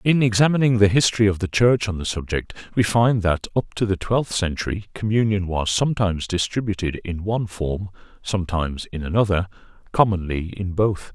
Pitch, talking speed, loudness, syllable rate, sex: 100 Hz, 165 wpm, -21 LUFS, 5.6 syllables/s, male